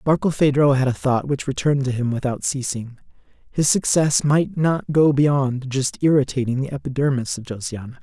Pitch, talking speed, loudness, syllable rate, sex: 135 Hz, 165 wpm, -20 LUFS, 5.2 syllables/s, male